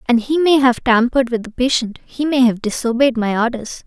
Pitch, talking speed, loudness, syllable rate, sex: 245 Hz, 200 wpm, -16 LUFS, 5.5 syllables/s, female